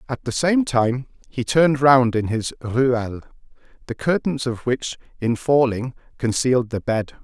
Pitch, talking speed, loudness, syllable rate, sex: 125 Hz, 160 wpm, -20 LUFS, 4.5 syllables/s, male